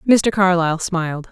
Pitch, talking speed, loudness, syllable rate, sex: 180 Hz, 135 wpm, -17 LUFS, 5.4 syllables/s, female